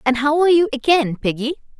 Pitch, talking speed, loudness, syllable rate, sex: 285 Hz, 200 wpm, -17 LUFS, 6.4 syllables/s, female